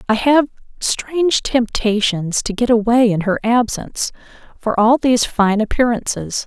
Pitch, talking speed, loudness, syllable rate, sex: 230 Hz, 140 wpm, -17 LUFS, 4.5 syllables/s, female